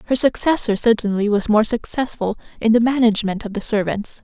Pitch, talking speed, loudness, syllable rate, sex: 220 Hz, 170 wpm, -18 LUFS, 5.8 syllables/s, female